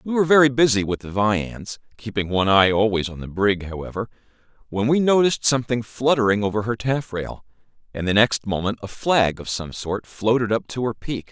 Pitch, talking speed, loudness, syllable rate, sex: 110 Hz, 195 wpm, -21 LUFS, 5.6 syllables/s, male